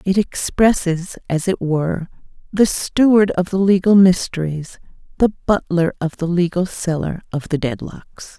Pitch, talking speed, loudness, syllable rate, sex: 180 Hz, 145 wpm, -18 LUFS, 4.6 syllables/s, female